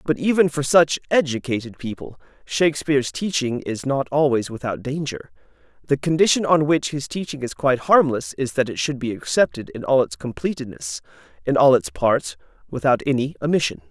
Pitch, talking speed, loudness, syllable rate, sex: 135 Hz, 170 wpm, -21 LUFS, 5.4 syllables/s, male